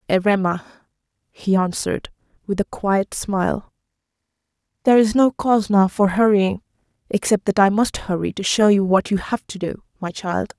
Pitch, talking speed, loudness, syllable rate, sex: 200 Hz, 165 wpm, -19 LUFS, 5.1 syllables/s, female